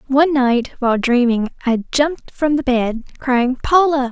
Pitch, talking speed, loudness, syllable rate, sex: 260 Hz, 160 wpm, -17 LUFS, 4.6 syllables/s, female